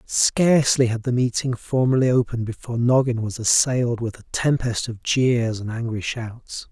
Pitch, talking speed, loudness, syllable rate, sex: 120 Hz, 160 wpm, -21 LUFS, 4.9 syllables/s, male